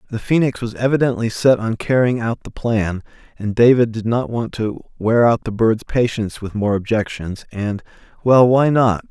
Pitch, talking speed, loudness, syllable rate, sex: 115 Hz, 180 wpm, -18 LUFS, 4.8 syllables/s, male